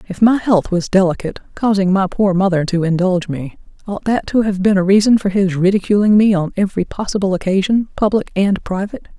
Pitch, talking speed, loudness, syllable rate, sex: 195 Hz, 195 wpm, -16 LUFS, 6.0 syllables/s, female